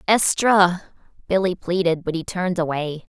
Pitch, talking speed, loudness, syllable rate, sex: 180 Hz, 135 wpm, -20 LUFS, 4.9 syllables/s, female